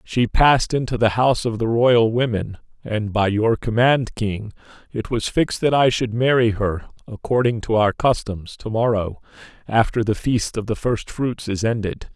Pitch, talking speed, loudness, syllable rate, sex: 115 Hz, 185 wpm, -20 LUFS, 4.7 syllables/s, male